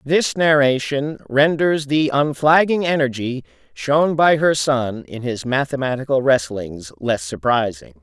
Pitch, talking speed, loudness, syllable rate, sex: 140 Hz, 120 wpm, -18 LUFS, 4.0 syllables/s, male